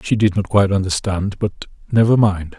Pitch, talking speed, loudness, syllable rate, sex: 100 Hz, 160 wpm, -17 LUFS, 5.3 syllables/s, male